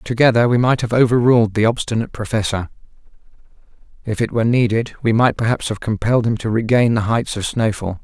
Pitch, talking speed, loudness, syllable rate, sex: 115 Hz, 185 wpm, -17 LUFS, 6.2 syllables/s, male